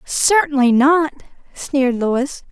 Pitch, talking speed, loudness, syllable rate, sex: 275 Hz, 95 wpm, -16 LUFS, 3.6 syllables/s, female